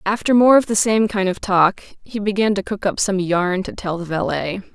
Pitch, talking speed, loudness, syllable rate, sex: 195 Hz, 240 wpm, -18 LUFS, 5.0 syllables/s, female